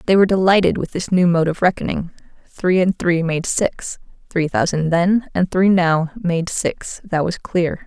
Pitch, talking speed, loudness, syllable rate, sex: 175 Hz, 190 wpm, -18 LUFS, 4.5 syllables/s, female